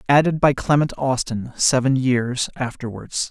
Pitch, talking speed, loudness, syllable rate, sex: 130 Hz, 125 wpm, -20 LUFS, 4.4 syllables/s, male